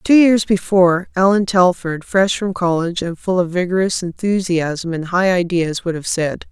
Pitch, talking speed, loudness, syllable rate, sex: 180 Hz, 175 wpm, -17 LUFS, 4.7 syllables/s, female